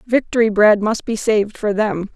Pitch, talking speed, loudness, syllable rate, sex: 210 Hz, 195 wpm, -17 LUFS, 4.9 syllables/s, female